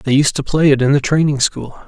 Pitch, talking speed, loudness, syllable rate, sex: 140 Hz, 290 wpm, -15 LUFS, 5.6 syllables/s, male